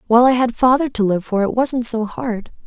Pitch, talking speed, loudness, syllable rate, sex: 235 Hz, 250 wpm, -17 LUFS, 5.5 syllables/s, female